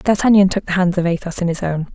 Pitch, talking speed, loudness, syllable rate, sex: 180 Hz, 280 wpm, -17 LUFS, 6.4 syllables/s, female